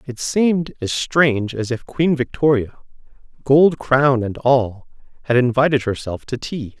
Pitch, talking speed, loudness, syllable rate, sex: 130 Hz, 150 wpm, -18 LUFS, 4.3 syllables/s, male